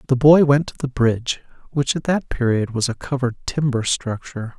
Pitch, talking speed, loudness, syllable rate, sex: 130 Hz, 195 wpm, -20 LUFS, 5.6 syllables/s, male